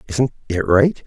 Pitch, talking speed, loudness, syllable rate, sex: 110 Hz, 170 wpm, -18 LUFS, 4.1 syllables/s, male